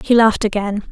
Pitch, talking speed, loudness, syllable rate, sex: 215 Hz, 195 wpm, -16 LUFS, 6.6 syllables/s, female